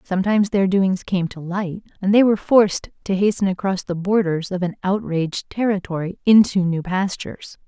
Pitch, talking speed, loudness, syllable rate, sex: 190 Hz, 170 wpm, -20 LUFS, 5.4 syllables/s, female